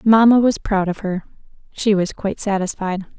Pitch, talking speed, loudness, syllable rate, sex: 200 Hz, 170 wpm, -18 LUFS, 5.1 syllables/s, female